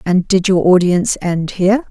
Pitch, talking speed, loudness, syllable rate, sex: 185 Hz, 190 wpm, -14 LUFS, 5.1 syllables/s, female